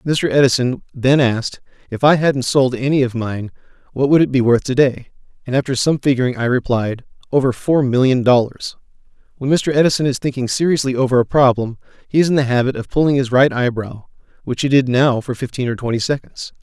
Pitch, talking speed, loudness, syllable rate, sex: 130 Hz, 200 wpm, -16 LUFS, 5.8 syllables/s, male